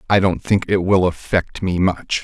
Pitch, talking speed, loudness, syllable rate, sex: 95 Hz, 215 wpm, -18 LUFS, 4.4 syllables/s, male